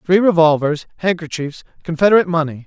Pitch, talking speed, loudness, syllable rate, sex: 165 Hz, 110 wpm, -16 LUFS, 6.3 syllables/s, male